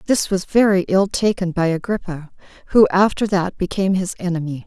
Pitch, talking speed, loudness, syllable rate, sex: 185 Hz, 165 wpm, -18 LUFS, 5.4 syllables/s, female